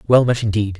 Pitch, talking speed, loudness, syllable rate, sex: 110 Hz, 225 wpm, -17 LUFS, 6.4 syllables/s, male